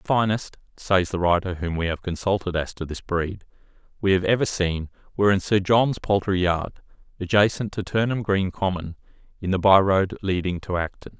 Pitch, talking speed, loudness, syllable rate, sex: 95 Hz, 180 wpm, -23 LUFS, 5.2 syllables/s, male